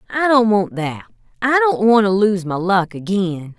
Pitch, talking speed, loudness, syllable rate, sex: 205 Hz, 200 wpm, -17 LUFS, 4.5 syllables/s, female